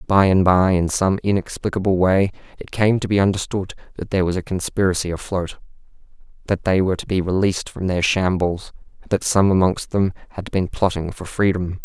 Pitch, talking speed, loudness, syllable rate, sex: 95 Hz, 180 wpm, -20 LUFS, 5.6 syllables/s, male